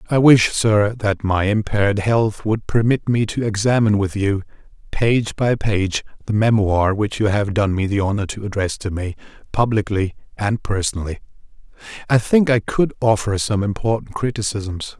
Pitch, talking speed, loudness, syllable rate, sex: 105 Hz, 165 wpm, -19 LUFS, 4.8 syllables/s, male